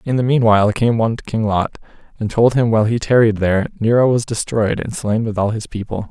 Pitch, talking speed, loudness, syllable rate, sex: 110 Hz, 235 wpm, -17 LUFS, 6.0 syllables/s, male